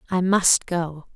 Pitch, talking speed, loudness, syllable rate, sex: 175 Hz, 155 wpm, -20 LUFS, 3.4 syllables/s, female